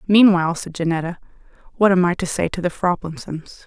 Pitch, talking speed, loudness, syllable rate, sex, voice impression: 180 Hz, 180 wpm, -19 LUFS, 5.8 syllables/s, female, feminine, adult-like, slightly tensed, bright, soft, slightly clear, intellectual, friendly, reassuring, elegant, kind, modest